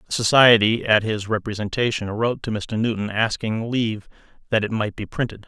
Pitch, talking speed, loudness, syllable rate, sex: 110 Hz, 175 wpm, -21 LUFS, 5.5 syllables/s, male